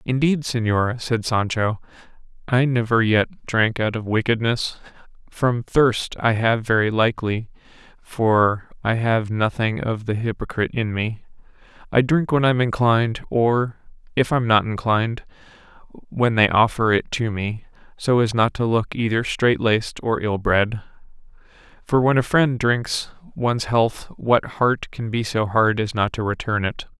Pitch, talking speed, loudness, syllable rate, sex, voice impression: 115 Hz, 160 wpm, -21 LUFS, 4.4 syllables/s, male, masculine, adult-like, tensed, clear, fluent, cool, intellectual, sincere, calm, friendly, reassuring, wild, lively, slightly kind